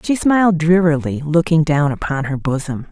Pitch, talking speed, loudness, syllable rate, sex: 160 Hz, 165 wpm, -16 LUFS, 5.0 syllables/s, female